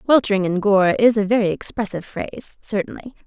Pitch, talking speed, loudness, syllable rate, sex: 210 Hz, 165 wpm, -19 LUFS, 6.3 syllables/s, female